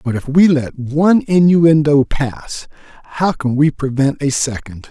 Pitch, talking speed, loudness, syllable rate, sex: 145 Hz, 160 wpm, -14 LUFS, 4.2 syllables/s, male